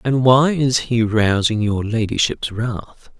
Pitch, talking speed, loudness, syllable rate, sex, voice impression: 115 Hz, 150 wpm, -17 LUFS, 3.6 syllables/s, male, masculine, adult-like, slightly thick, slightly dark, very calm